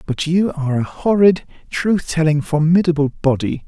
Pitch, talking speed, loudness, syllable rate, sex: 160 Hz, 145 wpm, -17 LUFS, 4.8 syllables/s, male